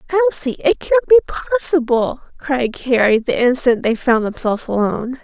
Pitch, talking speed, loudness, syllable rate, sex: 270 Hz, 150 wpm, -16 LUFS, 5.7 syllables/s, female